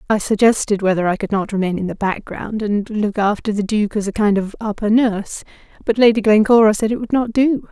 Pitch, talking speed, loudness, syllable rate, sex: 210 Hz, 220 wpm, -17 LUFS, 5.7 syllables/s, female